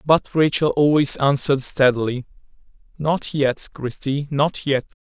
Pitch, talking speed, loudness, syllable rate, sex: 140 Hz, 120 wpm, -20 LUFS, 4.3 syllables/s, male